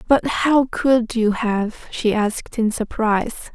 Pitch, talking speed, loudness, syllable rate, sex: 230 Hz, 150 wpm, -20 LUFS, 3.9 syllables/s, female